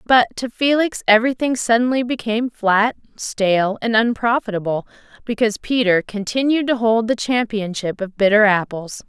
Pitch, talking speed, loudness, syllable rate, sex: 225 Hz, 130 wpm, -18 LUFS, 5.2 syllables/s, female